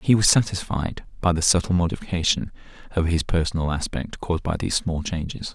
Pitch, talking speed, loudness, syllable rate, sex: 85 Hz, 175 wpm, -23 LUFS, 5.9 syllables/s, male